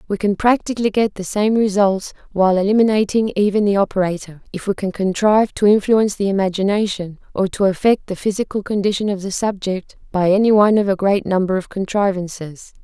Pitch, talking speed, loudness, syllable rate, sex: 200 Hz, 180 wpm, -18 LUFS, 5.9 syllables/s, female